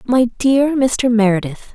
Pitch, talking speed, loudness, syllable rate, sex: 240 Hz, 140 wpm, -15 LUFS, 3.6 syllables/s, female